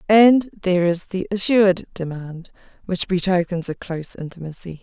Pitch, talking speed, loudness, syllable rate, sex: 185 Hz, 125 wpm, -20 LUFS, 5.1 syllables/s, female